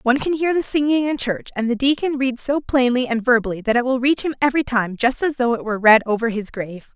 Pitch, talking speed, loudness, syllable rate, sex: 250 Hz, 265 wpm, -19 LUFS, 6.3 syllables/s, female